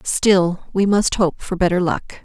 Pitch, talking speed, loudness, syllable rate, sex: 185 Hz, 190 wpm, -18 LUFS, 3.9 syllables/s, female